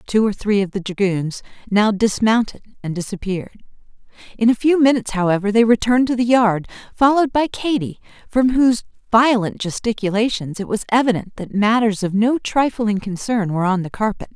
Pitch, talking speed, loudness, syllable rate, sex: 215 Hz, 165 wpm, -18 LUFS, 5.6 syllables/s, female